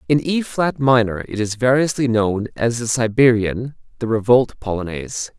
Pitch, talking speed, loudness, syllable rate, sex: 120 Hz, 155 wpm, -18 LUFS, 4.8 syllables/s, male